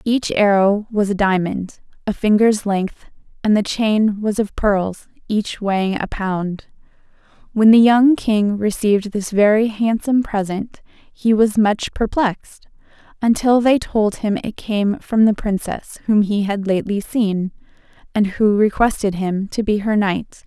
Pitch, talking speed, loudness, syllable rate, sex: 210 Hz, 155 wpm, -18 LUFS, 4.1 syllables/s, female